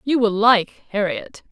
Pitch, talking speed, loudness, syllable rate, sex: 210 Hz, 160 wpm, -19 LUFS, 3.9 syllables/s, female